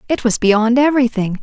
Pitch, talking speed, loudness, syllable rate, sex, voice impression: 240 Hz, 170 wpm, -14 LUFS, 5.6 syllables/s, female, feminine, adult-like, tensed, soft, clear, slightly intellectual, calm, friendly, reassuring, slightly sweet, kind, slightly modest